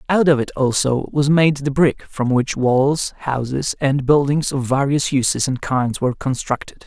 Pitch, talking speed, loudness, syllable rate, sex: 135 Hz, 185 wpm, -18 LUFS, 4.5 syllables/s, male